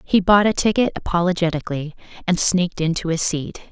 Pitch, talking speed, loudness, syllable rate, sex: 175 Hz, 180 wpm, -19 LUFS, 6.0 syllables/s, female